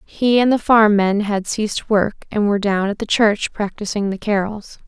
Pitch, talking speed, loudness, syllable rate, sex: 210 Hz, 210 wpm, -18 LUFS, 4.9 syllables/s, female